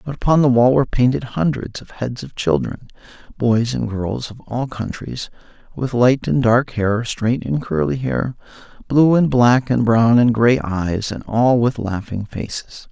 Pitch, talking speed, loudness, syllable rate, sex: 120 Hz, 175 wpm, -18 LUFS, 4.3 syllables/s, male